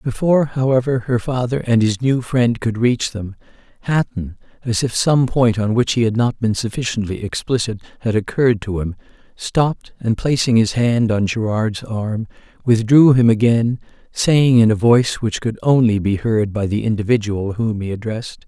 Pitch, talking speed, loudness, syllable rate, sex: 115 Hz, 175 wpm, -17 LUFS, 4.9 syllables/s, male